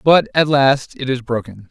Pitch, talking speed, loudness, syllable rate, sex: 135 Hz, 210 wpm, -16 LUFS, 4.6 syllables/s, male